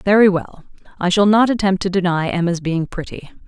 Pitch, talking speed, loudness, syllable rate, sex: 185 Hz, 190 wpm, -17 LUFS, 5.4 syllables/s, female